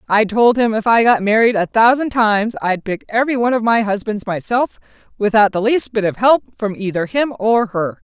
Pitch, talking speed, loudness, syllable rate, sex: 220 Hz, 215 wpm, -16 LUFS, 5.3 syllables/s, female